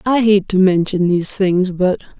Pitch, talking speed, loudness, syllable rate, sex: 190 Hz, 190 wpm, -15 LUFS, 4.8 syllables/s, female